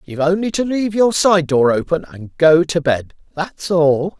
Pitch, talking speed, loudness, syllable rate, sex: 165 Hz, 200 wpm, -16 LUFS, 4.7 syllables/s, male